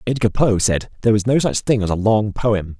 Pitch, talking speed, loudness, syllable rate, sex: 110 Hz, 260 wpm, -18 LUFS, 5.5 syllables/s, male